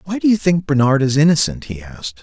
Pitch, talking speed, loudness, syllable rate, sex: 150 Hz, 245 wpm, -16 LUFS, 6.2 syllables/s, male